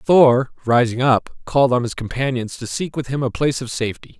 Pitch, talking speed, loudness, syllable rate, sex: 130 Hz, 215 wpm, -19 LUFS, 5.6 syllables/s, male